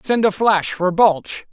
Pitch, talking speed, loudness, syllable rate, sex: 195 Hz, 195 wpm, -17 LUFS, 3.6 syllables/s, male